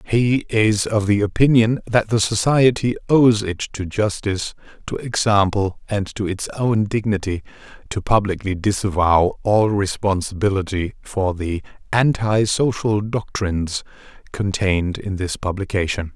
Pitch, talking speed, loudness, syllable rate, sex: 100 Hz, 125 wpm, -20 LUFS, 4.4 syllables/s, male